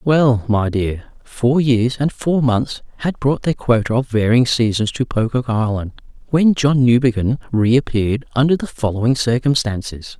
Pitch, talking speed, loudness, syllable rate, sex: 120 Hz, 155 wpm, -17 LUFS, 4.5 syllables/s, male